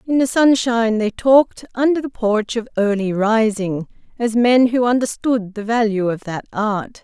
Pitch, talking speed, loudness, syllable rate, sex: 225 Hz, 170 wpm, -18 LUFS, 4.6 syllables/s, female